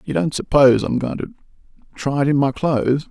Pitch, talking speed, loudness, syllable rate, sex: 145 Hz, 195 wpm, -18 LUFS, 5.7 syllables/s, male